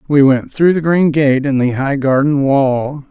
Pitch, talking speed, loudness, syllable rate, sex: 140 Hz, 215 wpm, -13 LUFS, 4.1 syllables/s, male